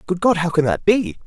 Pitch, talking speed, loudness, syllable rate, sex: 160 Hz, 285 wpm, -18 LUFS, 5.6 syllables/s, male